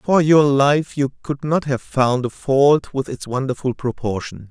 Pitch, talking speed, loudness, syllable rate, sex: 135 Hz, 185 wpm, -19 LUFS, 4.2 syllables/s, male